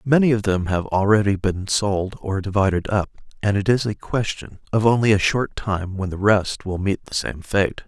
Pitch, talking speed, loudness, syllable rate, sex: 100 Hz, 215 wpm, -21 LUFS, 4.8 syllables/s, male